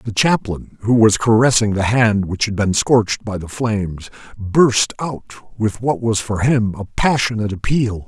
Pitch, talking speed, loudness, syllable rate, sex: 110 Hz, 180 wpm, -17 LUFS, 4.5 syllables/s, male